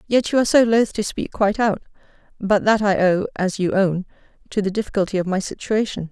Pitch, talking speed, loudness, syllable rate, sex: 200 Hz, 205 wpm, -20 LUFS, 6.0 syllables/s, female